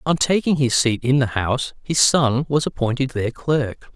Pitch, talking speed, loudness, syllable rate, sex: 130 Hz, 195 wpm, -19 LUFS, 4.6 syllables/s, male